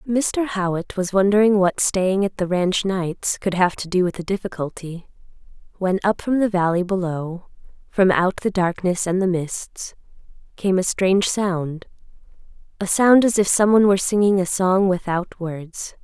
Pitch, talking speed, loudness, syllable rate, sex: 190 Hz, 170 wpm, -20 LUFS, 4.6 syllables/s, female